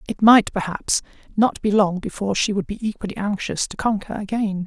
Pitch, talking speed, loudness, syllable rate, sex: 205 Hz, 195 wpm, -21 LUFS, 5.5 syllables/s, female